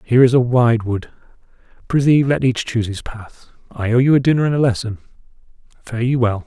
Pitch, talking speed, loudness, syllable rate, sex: 120 Hz, 205 wpm, -17 LUFS, 5.9 syllables/s, male